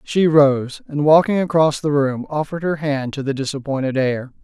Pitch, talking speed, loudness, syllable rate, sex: 145 Hz, 190 wpm, -18 LUFS, 5.0 syllables/s, male